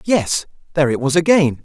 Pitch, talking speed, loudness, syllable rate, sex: 150 Hz, 185 wpm, -17 LUFS, 5.6 syllables/s, male